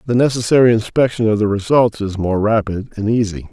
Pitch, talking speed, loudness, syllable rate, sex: 110 Hz, 190 wpm, -16 LUFS, 5.8 syllables/s, male